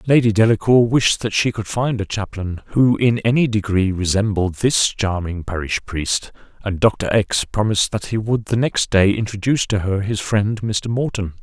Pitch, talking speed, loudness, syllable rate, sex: 105 Hz, 180 wpm, -18 LUFS, 4.7 syllables/s, male